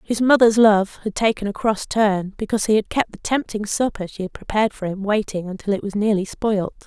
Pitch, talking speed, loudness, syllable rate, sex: 210 Hz, 225 wpm, -20 LUFS, 5.6 syllables/s, female